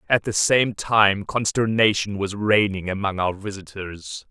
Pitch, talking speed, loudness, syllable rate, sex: 100 Hz, 140 wpm, -21 LUFS, 4.1 syllables/s, male